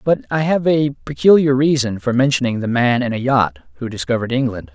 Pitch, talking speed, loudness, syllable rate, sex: 130 Hz, 200 wpm, -17 LUFS, 5.7 syllables/s, male